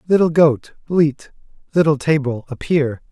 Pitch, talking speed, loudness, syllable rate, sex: 150 Hz, 115 wpm, -17 LUFS, 4.3 syllables/s, male